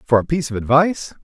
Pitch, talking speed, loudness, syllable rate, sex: 140 Hz, 240 wpm, -18 LUFS, 7.4 syllables/s, male